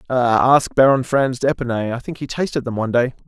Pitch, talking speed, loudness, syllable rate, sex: 125 Hz, 200 wpm, -18 LUFS, 5.4 syllables/s, male